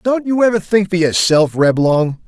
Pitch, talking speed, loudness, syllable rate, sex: 185 Hz, 185 wpm, -14 LUFS, 4.7 syllables/s, male